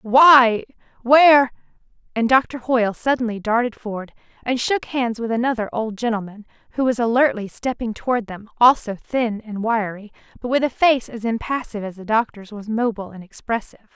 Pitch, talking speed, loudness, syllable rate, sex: 230 Hz, 160 wpm, -19 LUFS, 5.4 syllables/s, female